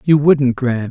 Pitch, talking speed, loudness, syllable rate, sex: 135 Hz, 200 wpm, -14 LUFS, 4.7 syllables/s, male